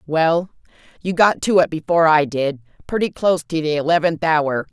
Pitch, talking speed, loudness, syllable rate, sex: 160 Hz, 165 wpm, -18 LUFS, 5.3 syllables/s, female